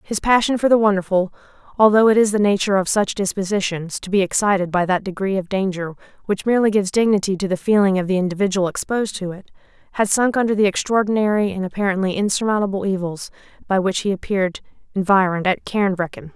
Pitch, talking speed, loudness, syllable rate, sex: 195 Hz, 185 wpm, -19 LUFS, 6.6 syllables/s, female